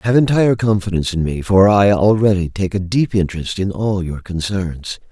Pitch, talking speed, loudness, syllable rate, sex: 95 Hz, 190 wpm, -16 LUFS, 5.2 syllables/s, male